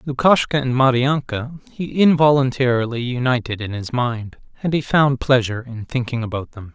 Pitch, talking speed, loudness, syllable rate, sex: 125 Hz, 150 wpm, -19 LUFS, 5.1 syllables/s, male